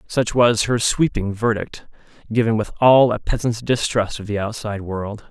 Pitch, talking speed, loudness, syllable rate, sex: 110 Hz, 170 wpm, -19 LUFS, 4.8 syllables/s, male